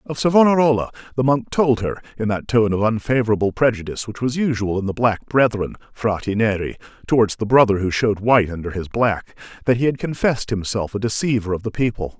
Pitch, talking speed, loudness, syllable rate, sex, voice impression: 115 Hz, 195 wpm, -19 LUFS, 6.0 syllables/s, male, masculine, adult-like, tensed, powerful, hard, clear, fluent, cool, slightly friendly, wild, lively, slightly strict, slightly intense